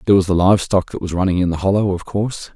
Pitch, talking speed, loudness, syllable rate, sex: 95 Hz, 305 wpm, -17 LUFS, 7.1 syllables/s, male